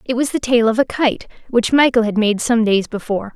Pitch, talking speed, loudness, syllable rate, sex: 235 Hz, 250 wpm, -16 LUFS, 5.6 syllables/s, female